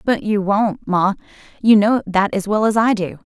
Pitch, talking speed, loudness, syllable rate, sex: 205 Hz, 215 wpm, -17 LUFS, 4.6 syllables/s, female